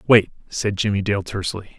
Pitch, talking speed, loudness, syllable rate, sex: 100 Hz, 170 wpm, -21 LUFS, 5.8 syllables/s, male